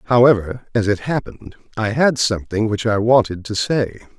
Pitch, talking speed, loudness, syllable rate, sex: 110 Hz, 170 wpm, -18 LUFS, 5.2 syllables/s, male